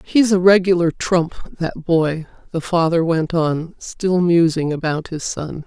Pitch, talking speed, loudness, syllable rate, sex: 170 Hz, 160 wpm, -18 LUFS, 3.8 syllables/s, female